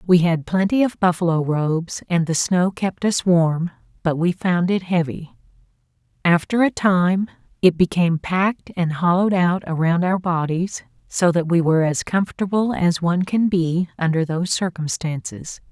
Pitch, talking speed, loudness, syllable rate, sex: 175 Hz, 160 wpm, -20 LUFS, 4.8 syllables/s, female